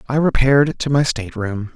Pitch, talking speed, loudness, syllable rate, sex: 130 Hz, 170 wpm, -18 LUFS, 5.7 syllables/s, male